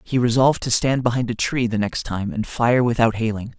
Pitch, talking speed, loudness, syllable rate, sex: 115 Hz, 235 wpm, -20 LUFS, 5.5 syllables/s, male